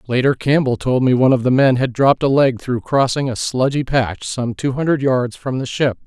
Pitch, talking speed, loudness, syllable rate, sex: 130 Hz, 240 wpm, -17 LUFS, 5.3 syllables/s, male